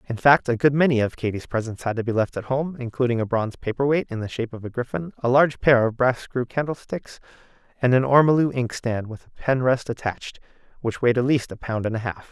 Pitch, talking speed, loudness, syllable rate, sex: 125 Hz, 245 wpm, -22 LUFS, 6.2 syllables/s, male